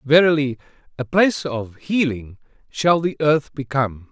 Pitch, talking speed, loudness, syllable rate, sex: 140 Hz, 130 wpm, -20 LUFS, 4.6 syllables/s, male